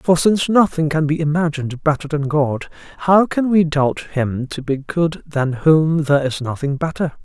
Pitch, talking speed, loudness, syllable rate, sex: 155 Hz, 190 wpm, -18 LUFS, 4.8 syllables/s, male